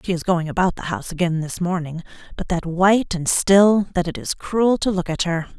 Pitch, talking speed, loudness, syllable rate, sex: 180 Hz, 235 wpm, -20 LUFS, 5.4 syllables/s, female